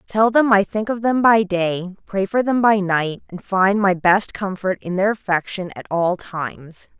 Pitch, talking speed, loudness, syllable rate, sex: 195 Hz, 205 wpm, -19 LUFS, 4.5 syllables/s, female